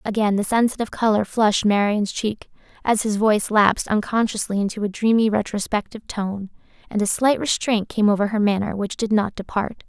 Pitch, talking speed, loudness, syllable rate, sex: 210 Hz, 175 wpm, -21 LUFS, 5.7 syllables/s, female